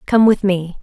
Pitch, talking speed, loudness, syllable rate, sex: 195 Hz, 220 wpm, -15 LUFS, 4.5 syllables/s, female